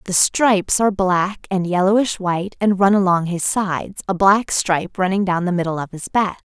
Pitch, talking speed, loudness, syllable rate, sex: 190 Hz, 205 wpm, -18 LUFS, 5.1 syllables/s, female